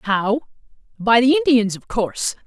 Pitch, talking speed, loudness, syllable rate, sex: 230 Hz, 145 wpm, -18 LUFS, 4.7 syllables/s, female